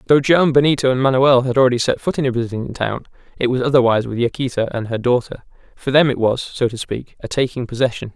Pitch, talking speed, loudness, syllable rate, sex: 125 Hz, 230 wpm, -17 LUFS, 6.5 syllables/s, male